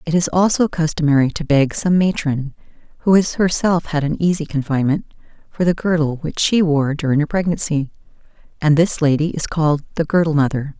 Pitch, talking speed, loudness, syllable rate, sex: 160 Hz, 180 wpm, -18 LUFS, 5.6 syllables/s, female